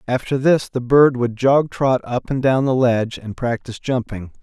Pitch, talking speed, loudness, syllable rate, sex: 125 Hz, 205 wpm, -18 LUFS, 4.9 syllables/s, male